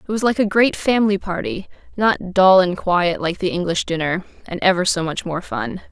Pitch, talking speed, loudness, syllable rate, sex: 190 Hz, 205 wpm, -18 LUFS, 5.1 syllables/s, female